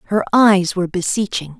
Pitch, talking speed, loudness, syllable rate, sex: 190 Hz, 150 wpm, -16 LUFS, 5.4 syllables/s, female